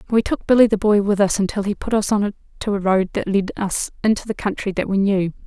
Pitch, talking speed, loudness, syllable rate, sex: 200 Hz, 265 wpm, -19 LUFS, 5.9 syllables/s, female